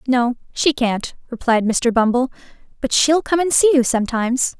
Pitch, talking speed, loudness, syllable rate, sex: 255 Hz, 170 wpm, -18 LUFS, 5.0 syllables/s, female